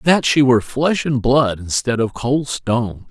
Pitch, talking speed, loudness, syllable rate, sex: 125 Hz, 195 wpm, -17 LUFS, 4.3 syllables/s, male